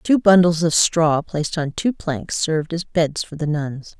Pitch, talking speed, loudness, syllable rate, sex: 165 Hz, 210 wpm, -19 LUFS, 4.3 syllables/s, female